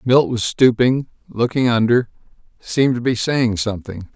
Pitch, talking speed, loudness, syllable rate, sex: 120 Hz, 145 wpm, -18 LUFS, 4.8 syllables/s, male